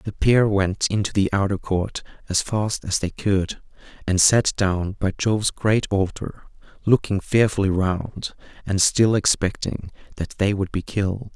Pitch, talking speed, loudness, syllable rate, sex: 100 Hz, 160 wpm, -21 LUFS, 4.2 syllables/s, male